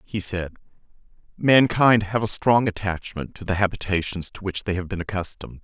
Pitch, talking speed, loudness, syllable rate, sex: 95 Hz, 170 wpm, -22 LUFS, 5.3 syllables/s, male